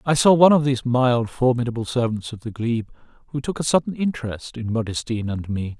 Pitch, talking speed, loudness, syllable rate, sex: 125 Hz, 205 wpm, -21 LUFS, 6.4 syllables/s, male